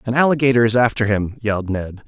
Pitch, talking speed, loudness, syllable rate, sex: 115 Hz, 205 wpm, -18 LUFS, 6.3 syllables/s, male